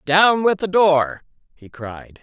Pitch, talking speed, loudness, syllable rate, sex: 160 Hz, 160 wpm, -17 LUFS, 3.3 syllables/s, male